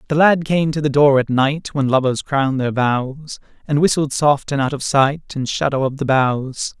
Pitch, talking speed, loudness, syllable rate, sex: 140 Hz, 220 wpm, -17 LUFS, 4.5 syllables/s, male